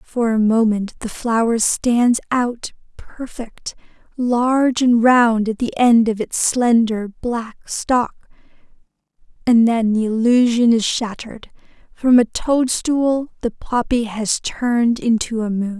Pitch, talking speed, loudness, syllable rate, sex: 235 Hz, 135 wpm, -17 LUFS, 3.7 syllables/s, female